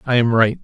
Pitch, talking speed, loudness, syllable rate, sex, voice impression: 125 Hz, 285 wpm, -16 LUFS, 6.0 syllables/s, male, masculine, adult-like, slightly fluent, slightly refreshing, friendly, slightly unique